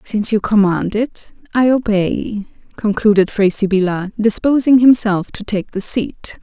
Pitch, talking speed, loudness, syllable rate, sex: 215 Hz, 140 wpm, -15 LUFS, 4.4 syllables/s, female